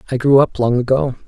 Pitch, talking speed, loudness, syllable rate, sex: 130 Hz, 235 wpm, -15 LUFS, 6.1 syllables/s, male